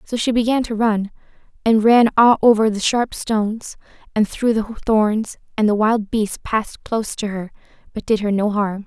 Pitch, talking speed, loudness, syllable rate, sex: 215 Hz, 190 wpm, -18 LUFS, 4.6 syllables/s, female